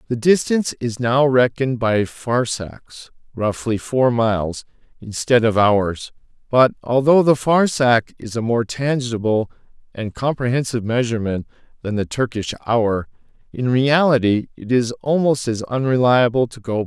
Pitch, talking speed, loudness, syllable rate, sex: 120 Hz, 135 wpm, -19 LUFS, 4.4 syllables/s, male